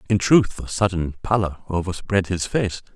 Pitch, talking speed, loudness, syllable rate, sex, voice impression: 95 Hz, 160 wpm, -22 LUFS, 4.8 syllables/s, male, very masculine, very adult-like, middle-aged, very thick, tensed, very powerful, bright, soft, slightly muffled, fluent, very raspy, very cool, intellectual, very sincere, calm, very mature, very friendly, reassuring, unique, very wild, slightly sweet, slightly lively, kind